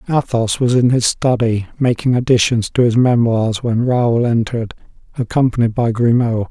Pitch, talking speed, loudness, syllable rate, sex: 120 Hz, 150 wpm, -15 LUFS, 4.9 syllables/s, male